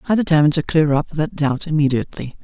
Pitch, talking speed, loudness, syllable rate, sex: 150 Hz, 195 wpm, -18 LUFS, 6.7 syllables/s, male